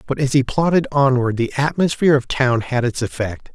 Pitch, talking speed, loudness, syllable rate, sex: 130 Hz, 205 wpm, -18 LUFS, 5.4 syllables/s, male